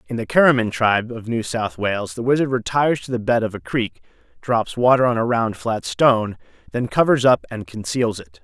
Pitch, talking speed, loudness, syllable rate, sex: 115 Hz, 215 wpm, -20 LUFS, 5.4 syllables/s, male